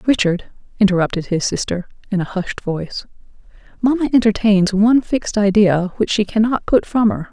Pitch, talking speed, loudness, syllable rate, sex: 205 Hz, 155 wpm, -17 LUFS, 5.5 syllables/s, female